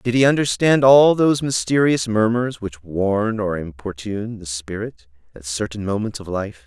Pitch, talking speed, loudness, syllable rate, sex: 110 Hz, 160 wpm, -19 LUFS, 4.7 syllables/s, male